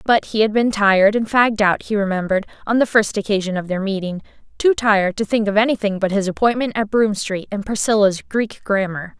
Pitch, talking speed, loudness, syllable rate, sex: 210 Hz, 210 wpm, -18 LUFS, 5.9 syllables/s, female